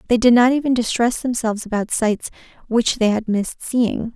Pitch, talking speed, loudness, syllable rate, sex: 230 Hz, 190 wpm, -19 LUFS, 5.3 syllables/s, female